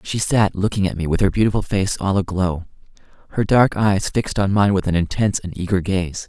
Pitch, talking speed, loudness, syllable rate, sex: 95 Hz, 220 wpm, -19 LUFS, 5.7 syllables/s, male